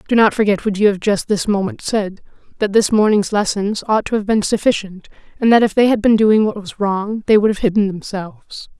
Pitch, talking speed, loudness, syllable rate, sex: 210 Hz, 230 wpm, -16 LUFS, 5.6 syllables/s, female